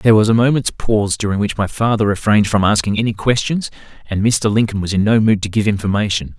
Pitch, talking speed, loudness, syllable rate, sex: 105 Hz, 225 wpm, -16 LUFS, 6.3 syllables/s, male